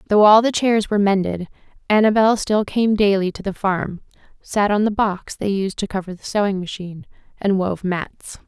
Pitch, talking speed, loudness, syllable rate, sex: 200 Hz, 190 wpm, -19 LUFS, 5.1 syllables/s, female